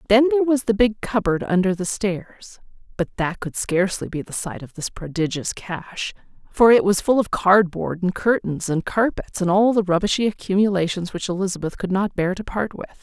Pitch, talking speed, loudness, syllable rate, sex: 195 Hz, 200 wpm, -21 LUFS, 5.2 syllables/s, female